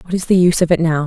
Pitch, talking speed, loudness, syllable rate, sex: 170 Hz, 395 wpm, -14 LUFS, 8.3 syllables/s, female